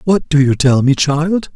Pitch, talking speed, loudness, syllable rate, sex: 150 Hz, 230 wpm, -13 LUFS, 4.2 syllables/s, male